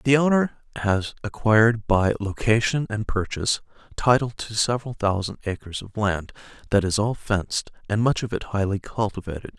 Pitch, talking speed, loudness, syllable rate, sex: 110 Hz, 155 wpm, -23 LUFS, 5.2 syllables/s, male